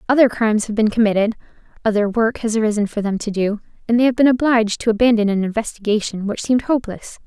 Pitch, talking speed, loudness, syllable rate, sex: 220 Hz, 205 wpm, -18 LUFS, 6.8 syllables/s, female